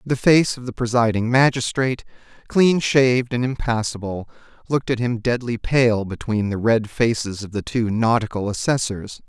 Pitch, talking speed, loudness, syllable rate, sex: 120 Hz, 155 wpm, -20 LUFS, 4.9 syllables/s, male